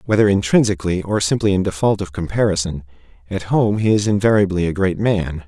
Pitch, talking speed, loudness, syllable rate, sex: 95 Hz, 175 wpm, -18 LUFS, 5.9 syllables/s, male